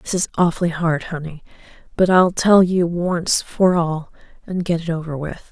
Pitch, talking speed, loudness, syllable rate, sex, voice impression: 170 Hz, 185 wpm, -19 LUFS, 4.6 syllables/s, female, feminine, slightly intellectual, calm, slightly elegant, slightly sweet